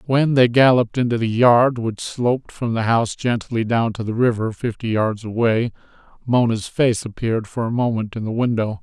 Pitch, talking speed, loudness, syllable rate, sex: 115 Hz, 190 wpm, -19 LUFS, 5.2 syllables/s, male